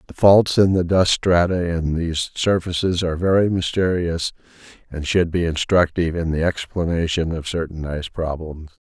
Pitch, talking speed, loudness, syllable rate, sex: 85 Hz, 155 wpm, -20 LUFS, 5.0 syllables/s, male